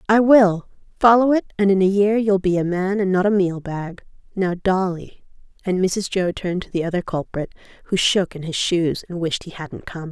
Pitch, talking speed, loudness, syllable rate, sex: 185 Hz, 220 wpm, -19 LUFS, 5.0 syllables/s, female